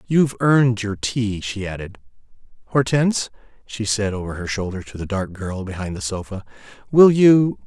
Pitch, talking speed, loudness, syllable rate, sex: 110 Hz, 165 wpm, -20 LUFS, 5.1 syllables/s, male